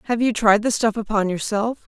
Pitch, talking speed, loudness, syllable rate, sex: 220 Hz, 215 wpm, -20 LUFS, 5.6 syllables/s, female